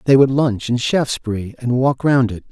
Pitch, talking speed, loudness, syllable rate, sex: 125 Hz, 215 wpm, -17 LUFS, 5.2 syllables/s, male